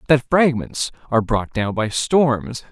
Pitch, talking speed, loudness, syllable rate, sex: 125 Hz, 155 wpm, -19 LUFS, 3.9 syllables/s, male